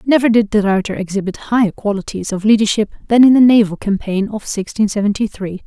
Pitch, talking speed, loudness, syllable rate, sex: 210 Hz, 190 wpm, -15 LUFS, 6.0 syllables/s, female